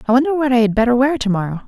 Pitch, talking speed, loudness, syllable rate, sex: 245 Hz, 285 wpm, -16 LUFS, 8.0 syllables/s, female